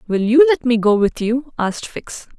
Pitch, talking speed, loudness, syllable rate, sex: 245 Hz, 225 wpm, -16 LUFS, 4.8 syllables/s, female